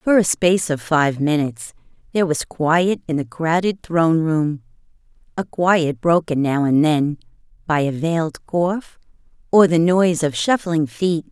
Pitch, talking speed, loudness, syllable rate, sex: 160 Hz, 160 wpm, -19 LUFS, 4.4 syllables/s, female